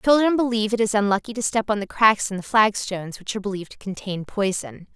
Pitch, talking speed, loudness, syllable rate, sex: 210 Hz, 230 wpm, -22 LUFS, 6.4 syllables/s, female